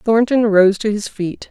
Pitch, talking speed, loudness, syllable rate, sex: 210 Hz, 200 wpm, -16 LUFS, 4.1 syllables/s, female